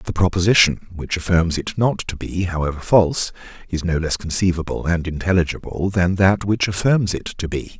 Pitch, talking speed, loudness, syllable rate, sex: 90 Hz, 175 wpm, -19 LUFS, 5.2 syllables/s, male